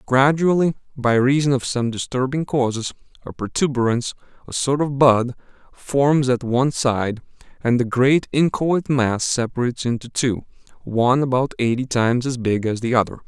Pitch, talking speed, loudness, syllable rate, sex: 130 Hz, 150 wpm, -20 LUFS, 5.1 syllables/s, male